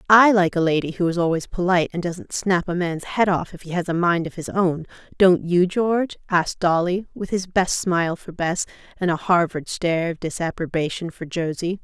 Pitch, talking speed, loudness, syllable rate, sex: 175 Hz, 215 wpm, -21 LUFS, 5.3 syllables/s, female